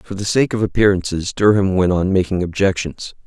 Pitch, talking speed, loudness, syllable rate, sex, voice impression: 95 Hz, 185 wpm, -17 LUFS, 5.5 syllables/s, male, masculine, very adult-like, slightly thick, cool, sincere, calm